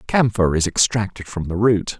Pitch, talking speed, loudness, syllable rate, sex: 100 Hz, 180 wpm, -19 LUFS, 4.9 syllables/s, male